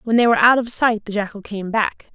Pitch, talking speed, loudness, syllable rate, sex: 220 Hz, 280 wpm, -18 LUFS, 5.9 syllables/s, female